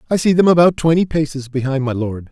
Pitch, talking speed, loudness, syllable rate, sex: 150 Hz, 235 wpm, -16 LUFS, 6.2 syllables/s, male